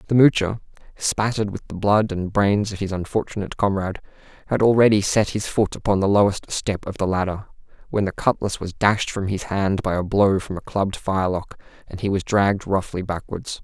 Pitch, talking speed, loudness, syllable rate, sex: 100 Hz, 200 wpm, -21 LUFS, 5.6 syllables/s, male